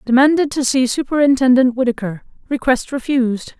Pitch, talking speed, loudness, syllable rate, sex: 260 Hz, 115 wpm, -16 LUFS, 5.5 syllables/s, female